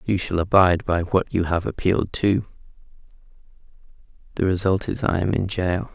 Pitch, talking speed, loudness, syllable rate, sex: 95 Hz, 160 wpm, -22 LUFS, 5.4 syllables/s, male